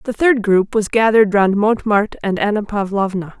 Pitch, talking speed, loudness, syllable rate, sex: 210 Hz, 175 wpm, -16 LUFS, 5.4 syllables/s, female